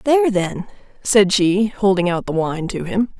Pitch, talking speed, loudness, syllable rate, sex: 200 Hz, 190 wpm, -18 LUFS, 4.4 syllables/s, female